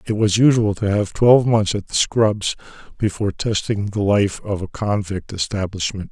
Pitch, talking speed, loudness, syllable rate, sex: 100 Hz, 175 wpm, -19 LUFS, 4.9 syllables/s, male